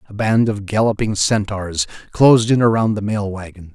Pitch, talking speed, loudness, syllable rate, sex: 105 Hz, 175 wpm, -17 LUFS, 5.1 syllables/s, male